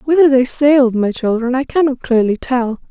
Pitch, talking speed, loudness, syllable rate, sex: 260 Hz, 185 wpm, -14 LUFS, 5.1 syllables/s, female